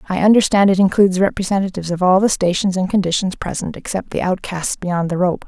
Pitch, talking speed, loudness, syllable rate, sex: 185 Hz, 195 wpm, -17 LUFS, 6.2 syllables/s, female